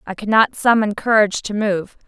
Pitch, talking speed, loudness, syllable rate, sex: 210 Hz, 200 wpm, -17 LUFS, 5.4 syllables/s, female